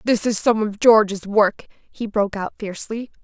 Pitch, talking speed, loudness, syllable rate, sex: 210 Hz, 185 wpm, -19 LUFS, 4.8 syllables/s, female